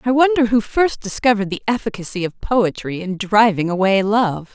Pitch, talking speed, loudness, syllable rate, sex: 215 Hz, 170 wpm, -18 LUFS, 5.2 syllables/s, female